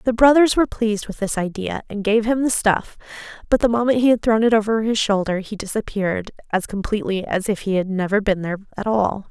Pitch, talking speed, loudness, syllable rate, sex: 210 Hz, 225 wpm, -20 LUFS, 6.1 syllables/s, female